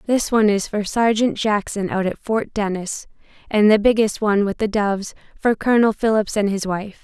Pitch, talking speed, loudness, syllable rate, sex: 210 Hz, 195 wpm, -19 LUFS, 5.3 syllables/s, female